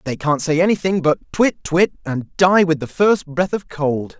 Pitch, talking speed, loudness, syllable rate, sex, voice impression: 165 Hz, 215 wpm, -18 LUFS, 4.3 syllables/s, male, masculine, adult-like, tensed, powerful, bright, slightly halting, raspy, cool, friendly, wild, lively, intense, sharp